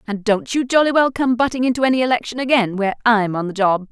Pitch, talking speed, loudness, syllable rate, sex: 235 Hz, 245 wpm, -18 LUFS, 6.6 syllables/s, female